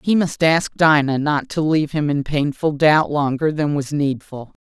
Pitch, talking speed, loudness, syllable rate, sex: 150 Hz, 195 wpm, -18 LUFS, 4.5 syllables/s, female